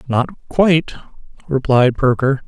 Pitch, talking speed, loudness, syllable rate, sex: 135 Hz, 95 wpm, -16 LUFS, 4.6 syllables/s, male